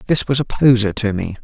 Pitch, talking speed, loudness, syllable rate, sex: 115 Hz, 250 wpm, -16 LUFS, 5.7 syllables/s, male